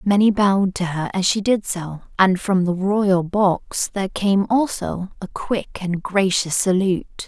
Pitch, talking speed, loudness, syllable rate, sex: 190 Hz, 175 wpm, -20 LUFS, 4.1 syllables/s, female